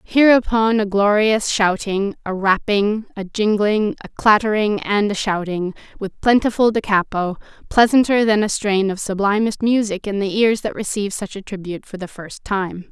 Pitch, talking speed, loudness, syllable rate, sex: 205 Hz, 165 wpm, -18 LUFS, 4.7 syllables/s, female